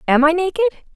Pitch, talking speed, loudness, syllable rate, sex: 315 Hz, 190 wpm, -17 LUFS, 8.9 syllables/s, female